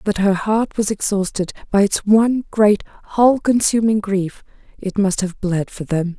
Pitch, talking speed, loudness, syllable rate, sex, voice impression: 205 Hz, 185 wpm, -18 LUFS, 4.6 syllables/s, female, very feminine, adult-like, slightly soft, slightly intellectual, calm, elegant